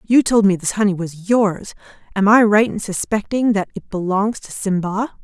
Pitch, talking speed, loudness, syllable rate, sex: 205 Hz, 195 wpm, -18 LUFS, 4.7 syllables/s, female